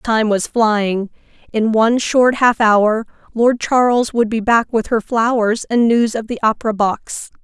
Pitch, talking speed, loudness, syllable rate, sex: 225 Hz, 180 wpm, -16 LUFS, 4.1 syllables/s, female